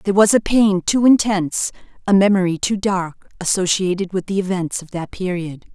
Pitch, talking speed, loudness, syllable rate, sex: 190 Hz, 180 wpm, -18 LUFS, 5.3 syllables/s, female